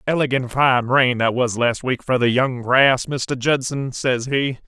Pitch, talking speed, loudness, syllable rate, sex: 130 Hz, 195 wpm, -19 LUFS, 4.0 syllables/s, male